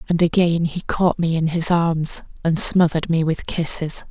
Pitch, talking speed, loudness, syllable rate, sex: 165 Hz, 190 wpm, -19 LUFS, 4.6 syllables/s, female